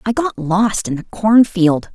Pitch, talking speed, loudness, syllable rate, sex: 200 Hz, 185 wpm, -15 LUFS, 3.8 syllables/s, female